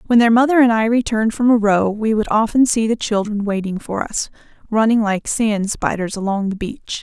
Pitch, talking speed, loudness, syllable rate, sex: 215 Hz, 215 wpm, -17 LUFS, 5.3 syllables/s, female